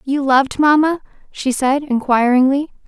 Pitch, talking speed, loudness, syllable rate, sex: 275 Hz, 125 wpm, -15 LUFS, 4.7 syllables/s, female